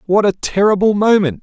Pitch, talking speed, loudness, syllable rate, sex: 195 Hz, 170 wpm, -14 LUFS, 5.4 syllables/s, male